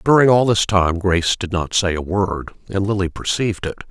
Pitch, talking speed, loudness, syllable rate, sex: 95 Hz, 230 wpm, -18 LUFS, 5.4 syllables/s, male